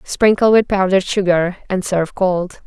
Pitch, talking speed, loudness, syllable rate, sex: 190 Hz, 160 wpm, -16 LUFS, 4.9 syllables/s, female